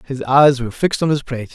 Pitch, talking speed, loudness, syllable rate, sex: 135 Hz, 275 wpm, -16 LUFS, 7.3 syllables/s, male